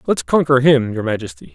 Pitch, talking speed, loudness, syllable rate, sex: 125 Hz, 195 wpm, -16 LUFS, 5.6 syllables/s, male